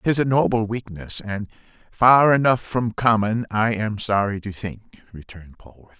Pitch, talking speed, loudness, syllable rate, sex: 105 Hz, 170 wpm, -20 LUFS, 4.9 syllables/s, male